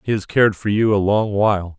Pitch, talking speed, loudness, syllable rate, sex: 100 Hz, 270 wpm, -17 LUFS, 5.9 syllables/s, male